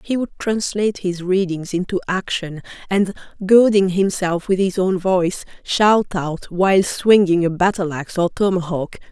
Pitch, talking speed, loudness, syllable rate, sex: 185 Hz, 150 wpm, -18 LUFS, 4.5 syllables/s, female